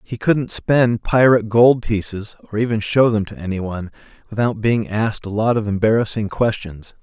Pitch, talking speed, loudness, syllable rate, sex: 110 Hz, 170 wpm, -18 LUFS, 5.1 syllables/s, male